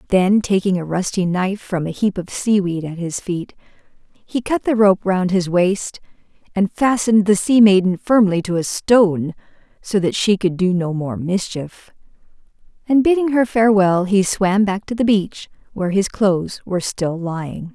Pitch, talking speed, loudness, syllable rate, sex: 195 Hz, 180 wpm, -18 LUFS, 4.8 syllables/s, female